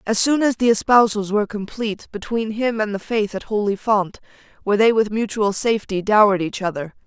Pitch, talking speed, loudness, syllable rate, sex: 210 Hz, 195 wpm, -19 LUFS, 5.8 syllables/s, female